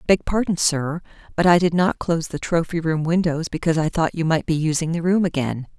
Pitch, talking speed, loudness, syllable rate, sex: 165 Hz, 230 wpm, -21 LUFS, 5.7 syllables/s, female